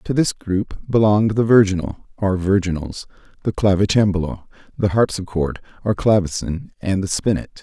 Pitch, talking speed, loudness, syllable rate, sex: 100 Hz, 135 wpm, -19 LUFS, 4.9 syllables/s, male